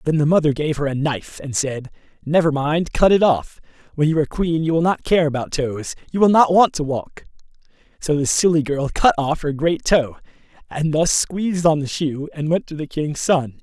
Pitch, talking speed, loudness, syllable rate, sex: 155 Hz, 225 wpm, -19 LUFS, 5.2 syllables/s, male